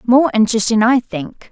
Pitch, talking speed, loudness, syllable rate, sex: 240 Hz, 160 wpm, -14 LUFS, 5.2 syllables/s, female